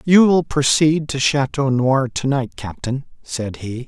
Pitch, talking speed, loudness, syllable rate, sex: 135 Hz, 170 wpm, -18 LUFS, 4.0 syllables/s, male